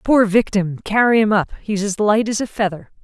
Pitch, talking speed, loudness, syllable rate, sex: 205 Hz, 220 wpm, -17 LUFS, 5.1 syllables/s, female